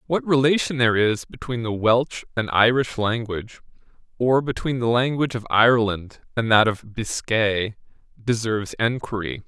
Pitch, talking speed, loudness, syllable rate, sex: 115 Hz, 140 wpm, -22 LUFS, 4.9 syllables/s, male